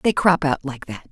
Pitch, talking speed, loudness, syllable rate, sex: 145 Hz, 270 wpm, -20 LUFS, 5.0 syllables/s, female